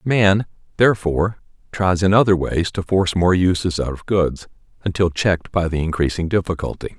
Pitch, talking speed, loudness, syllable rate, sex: 90 Hz, 165 wpm, -19 LUFS, 5.5 syllables/s, male